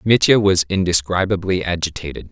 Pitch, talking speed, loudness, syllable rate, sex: 95 Hz, 105 wpm, -17 LUFS, 5.4 syllables/s, male